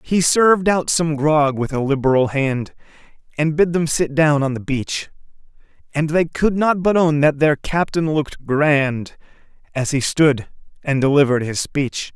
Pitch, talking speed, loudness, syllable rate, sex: 150 Hz, 175 wpm, -18 LUFS, 4.4 syllables/s, male